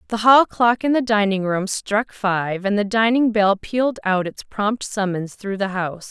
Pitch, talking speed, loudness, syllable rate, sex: 210 Hz, 205 wpm, -19 LUFS, 4.5 syllables/s, female